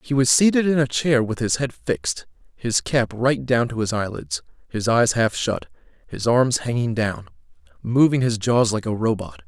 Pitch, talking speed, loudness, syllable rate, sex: 115 Hz, 195 wpm, -21 LUFS, 4.7 syllables/s, male